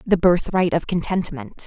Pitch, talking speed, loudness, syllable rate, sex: 170 Hz, 145 wpm, -20 LUFS, 4.5 syllables/s, female